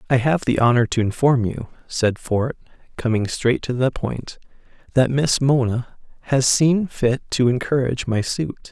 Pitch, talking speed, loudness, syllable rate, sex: 130 Hz, 165 wpm, -20 LUFS, 4.4 syllables/s, male